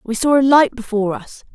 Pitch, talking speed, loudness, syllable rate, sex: 245 Hz, 230 wpm, -15 LUFS, 5.8 syllables/s, female